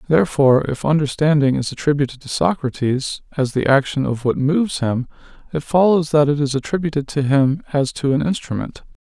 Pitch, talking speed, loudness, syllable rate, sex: 145 Hz, 175 wpm, -18 LUFS, 5.6 syllables/s, male